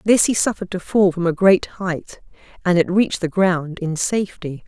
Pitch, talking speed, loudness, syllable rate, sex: 180 Hz, 205 wpm, -19 LUFS, 5.1 syllables/s, female